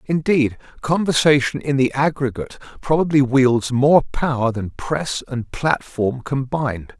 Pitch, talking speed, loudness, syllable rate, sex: 135 Hz, 120 wpm, -19 LUFS, 4.3 syllables/s, male